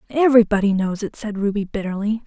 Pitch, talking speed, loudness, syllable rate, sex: 210 Hz, 160 wpm, -19 LUFS, 6.3 syllables/s, female